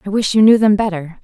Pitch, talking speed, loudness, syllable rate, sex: 200 Hz, 290 wpm, -13 LUFS, 6.4 syllables/s, female